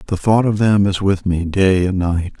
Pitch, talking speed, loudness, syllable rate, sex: 95 Hz, 250 wpm, -16 LUFS, 4.7 syllables/s, male